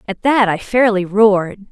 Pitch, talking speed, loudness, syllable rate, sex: 210 Hz, 175 wpm, -14 LUFS, 4.6 syllables/s, female